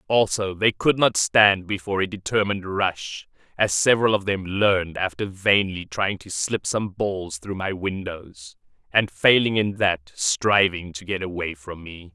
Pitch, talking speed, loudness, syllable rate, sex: 95 Hz, 170 wpm, -22 LUFS, 4.3 syllables/s, male